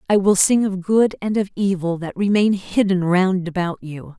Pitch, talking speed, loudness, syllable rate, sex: 190 Hz, 200 wpm, -19 LUFS, 4.7 syllables/s, female